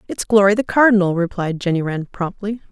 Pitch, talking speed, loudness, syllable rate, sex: 195 Hz, 175 wpm, -17 LUFS, 5.7 syllables/s, female